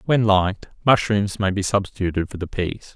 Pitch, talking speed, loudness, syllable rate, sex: 100 Hz, 185 wpm, -21 LUFS, 5.3 syllables/s, male